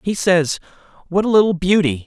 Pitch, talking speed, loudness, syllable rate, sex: 180 Hz, 175 wpm, -17 LUFS, 5.5 syllables/s, male